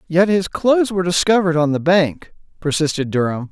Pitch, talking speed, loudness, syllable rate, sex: 165 Hz, 170 wpm, -17 LUFS, 5.8 syllables/s, male